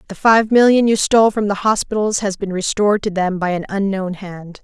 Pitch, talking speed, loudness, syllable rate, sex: 200 Hz, 220 wpm, -16 LUFS, 5.5 syllables/s, female